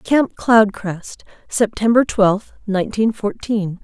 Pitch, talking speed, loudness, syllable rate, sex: 210 Hz, 95 wpm, -18 LUFS, 3.7 syllables/s, female